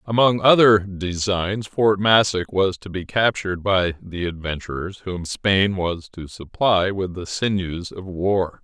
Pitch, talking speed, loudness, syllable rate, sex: 95 Hz, 155 wpm, -20 LUFS, 3.9 syllables/s, male